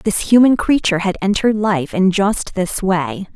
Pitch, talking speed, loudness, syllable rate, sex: 195 Hz, 180 wpm, -16 LUFS, 4.6 syllables/s, female